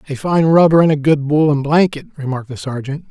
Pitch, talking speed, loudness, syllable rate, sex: 145 Hz, 210 wpm, -15 LUFS, 6.1 syllables/s, male